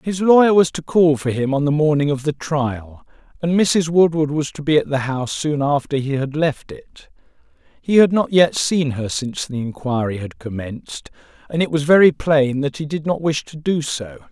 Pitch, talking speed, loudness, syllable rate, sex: 145 Hz, 220 wpm, -18 LUFS, 5.0 syllables/s, male